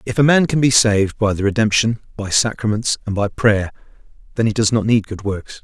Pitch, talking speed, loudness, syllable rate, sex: 110 Hz, 225 wpm, -17 LUFS, 5.7 syllables/s, male